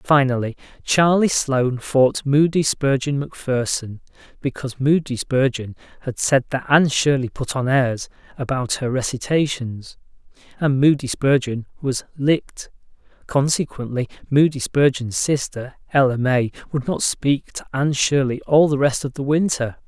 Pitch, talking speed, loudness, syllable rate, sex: 135 Hz, 135 wpm, -20 LUFS, 4.6 syllables/s, male